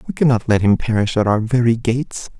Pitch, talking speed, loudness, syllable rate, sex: 115 Hz, 225 wpm, -17 LUFS, 6.0 syllables/s, male